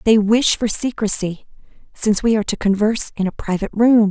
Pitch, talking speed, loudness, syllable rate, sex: 215 Hz, 190 wpm, -18 LUFS, 6.0 syllables/s, female